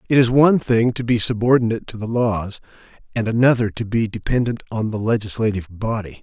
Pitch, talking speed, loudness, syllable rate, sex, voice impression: 115 Hz, 185 wpm, -19 LUFS, 6.2 syllables/s, male, masculine, adult-like, tensed, powerful, hard, raspy, cool, mature, wild, lively, slightly strict, slightly intense